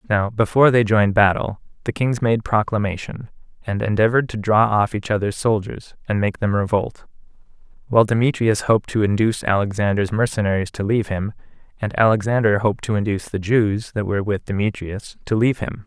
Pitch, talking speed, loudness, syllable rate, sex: 105 Hz, 170 wpm, -20 LUFS, 5.9 syllables/s, male